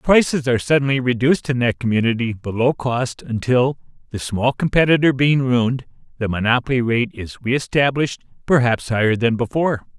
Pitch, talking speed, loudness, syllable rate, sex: 125 Hz, 145 wpm, -19 LUFS, 5.5 syllables/s, male